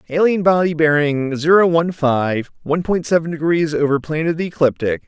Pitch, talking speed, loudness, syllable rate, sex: 155 Hz, 175 wpm, -17 LUFS, 5.9 syllables/s, male